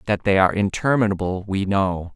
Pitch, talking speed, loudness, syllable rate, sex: 100 Hz, 165 wpm, -20 LUFS, 5.6 syllables/s, male